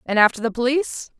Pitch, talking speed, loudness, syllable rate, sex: 245 Hz, 200 wpm, -20 LUFS, 6.9 syllables/s, female